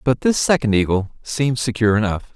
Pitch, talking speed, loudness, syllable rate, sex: 120 Hz, 180 wpm, -19 LUFS, 5.9 syllables/s, male